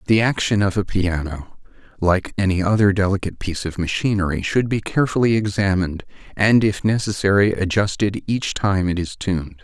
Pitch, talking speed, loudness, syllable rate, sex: 95 Hz, 155 wpm, -20 LUFS, 5.5 syllables/s, male